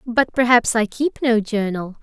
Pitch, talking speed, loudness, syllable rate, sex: 230 Hz, 175 wpm, -18 LUFS, 4.4 syllables/s, female